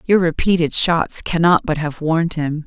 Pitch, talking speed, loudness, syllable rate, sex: 165 Hz, 180 wpm, -17 LUFS, 4.8 syllables/s, female